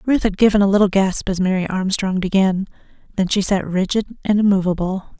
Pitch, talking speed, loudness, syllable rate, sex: 195 Hz, 185 wpm, -18 LUFS, 5.5 syllables/s, female